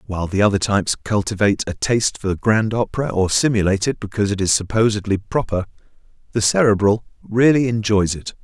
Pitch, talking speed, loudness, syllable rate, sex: 105 Hz, 165 wpm, -19 LUFS, 6.2 syllables/s, male